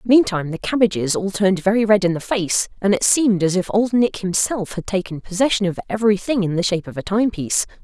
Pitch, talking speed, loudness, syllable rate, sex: 200 Hz, 230 wpm, -19 LUFS, 6.4 syllables/s, female